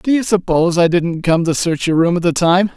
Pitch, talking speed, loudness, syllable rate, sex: 175 Hz, 285 wpm, -15 LUFS, 5.5 syllables/s, male